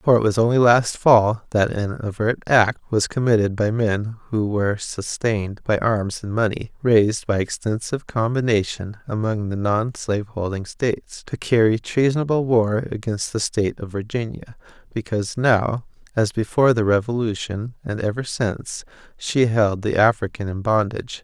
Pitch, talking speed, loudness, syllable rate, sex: 110 Hz, 155 wpm, -21 LUFS, 4.8 syllables/s, male